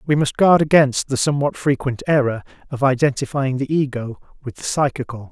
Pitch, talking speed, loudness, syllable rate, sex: 135 Hz, 170 wpm, -19 LUFS, 5.6 syllables/s, male